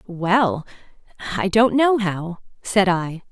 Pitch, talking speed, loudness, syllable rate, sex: 195 Hz, 110 wpm, -19 LUFS, 3.1 syllables/s, female